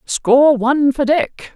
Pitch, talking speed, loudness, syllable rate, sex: 265 Hz, 155 wpm, -14 LUFS, 4.1 syllables/s, female